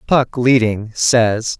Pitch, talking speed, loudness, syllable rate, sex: 115 Hz, 115 wpm, -15 LUFS, 2.9 syllables/s, male